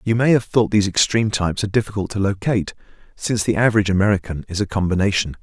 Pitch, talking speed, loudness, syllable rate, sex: 105 Hz, 200 wpm, -19 LUFS, 7.6 syllables/s, male